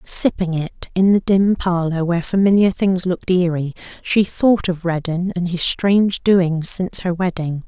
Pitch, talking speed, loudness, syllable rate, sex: 180 Hz, 170 wpm, -18 LUFS, 4.5 syllables/s, female